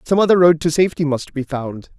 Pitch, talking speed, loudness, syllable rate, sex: 155 Hz, 240 wpm, -17 LUFS, 6.2 syllables/s, male